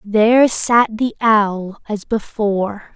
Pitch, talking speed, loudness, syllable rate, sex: 215 Hz, 120 wpm, -16 LUFS, 3.3 syllables/s, female